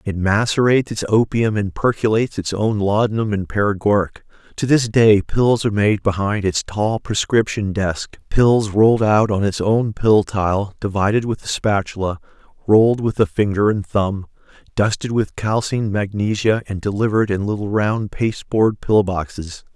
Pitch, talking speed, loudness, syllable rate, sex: 105 Hz, 155 wpm, -18 LUFS, 4.8 syllables/s, male